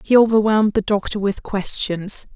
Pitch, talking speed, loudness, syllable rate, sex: 205 Hz, 155 wpm, -19 LUFS, 5.0 syllables/s, female